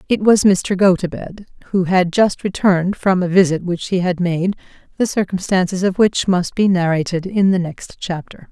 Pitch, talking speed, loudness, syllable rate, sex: 185 Hz, 185 wpm, -17 LUFS, 4.9 syllables/s, female